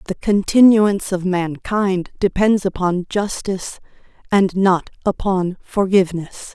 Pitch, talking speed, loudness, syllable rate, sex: 190 Hz, 100 wpm, -18 LUFS, 4.1 syllables/s, female